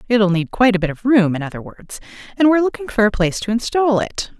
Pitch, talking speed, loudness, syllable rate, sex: 220 Hz, 260 wpm, -17 LUFS, 6.6 syllables/s, female